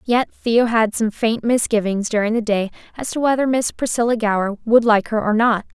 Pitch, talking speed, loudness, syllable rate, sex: 225 Hz, 205 wpm, -18 LUFS, 5.2 syllables/s, female